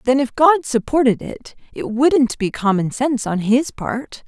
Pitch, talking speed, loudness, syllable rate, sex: 250 Hz, 185 wpm, -18 LUFS, 4.3 syllables/s, female